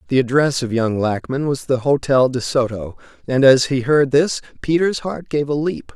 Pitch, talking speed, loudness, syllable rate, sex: 135 Hz, 200 wpm, -18 LUFS, 4.8 syllables/s, male